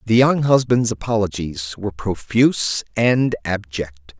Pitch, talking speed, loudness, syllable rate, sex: 105 Hz, 115 wpm, -19 LUFS, 4.2 syllables/s, male